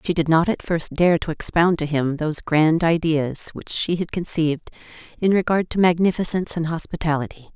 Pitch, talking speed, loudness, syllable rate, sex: 165 Hz, 185 wpm, -21 LUFS, 5.5 syllables/s, female